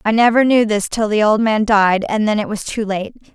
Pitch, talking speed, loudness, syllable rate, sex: 215 Hz, 270 wpm, -16 LUFS, 5.3 syllables/s, female